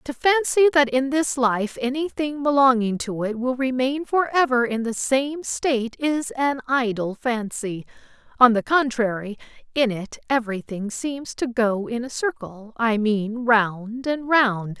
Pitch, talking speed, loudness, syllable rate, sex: 245 Hz, 160 wpm, -22 LUFS, 4.1 syllables/s, female